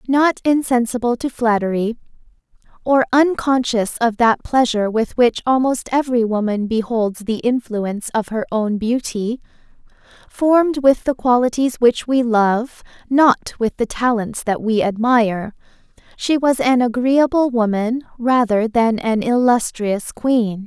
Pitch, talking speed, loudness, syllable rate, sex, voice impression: 235 Hz, 130 wpm, -17 LUFS, 4.3 syllables/s, female, very feminine, slightly young, slightly adult-like, very thin, slightly tensed, slightly weak, very bright, soft, very clear, fluent, slightly raspy, very cute, very intellectual, very refreshing, sincere, very calm, very friendly, very reassuring, very unique, elegant, sweet, lively, kind, slightly intense